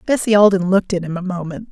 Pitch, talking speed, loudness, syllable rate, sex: 190 Hz, 245 wpm, -16 LUFS, 6.9 syllables/s, female